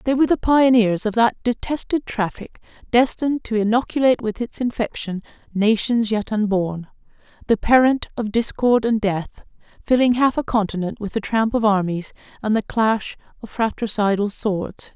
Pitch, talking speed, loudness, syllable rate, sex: 225 Hz, 150 wpm, -20 LUFS, 4.9 syllables/s, female